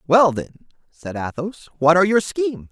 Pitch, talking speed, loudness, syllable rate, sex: 175 Hz, 175 wpm, -19 LUFS, 5.3 syllables/s, male